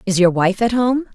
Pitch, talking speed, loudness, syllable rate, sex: 210 Hz, 265 wpm, -16 LUFS, 5.4 syllables/s, female